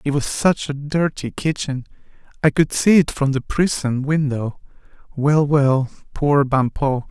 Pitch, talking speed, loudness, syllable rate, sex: 140 Hz, 125 wpm, -19 LUFS, 3.9 syllables/s, male